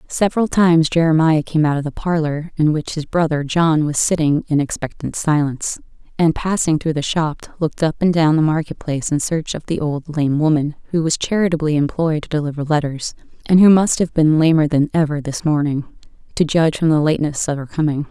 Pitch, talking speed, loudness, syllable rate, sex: 155 Hz, 205 wpm, -17 LUFS, 5.7 syllables/s, female